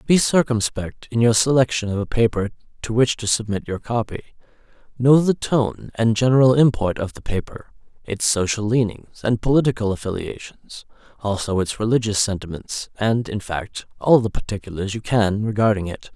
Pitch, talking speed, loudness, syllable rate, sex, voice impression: 110 Hz, 160 wpm, -20 LUFS, 5.1 syllables/s, male, masculine, adult-like, tensed, powerful, bright, soft, raspy, cool, intellectual, slightly refreshing, friendly, reassuring, slightly wild, lively, slightly kind